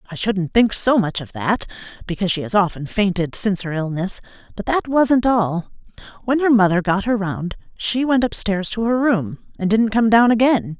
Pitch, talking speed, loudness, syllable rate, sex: 210 Hz, 200 wpm, -19 LUFS, 5.0 syllables/s, female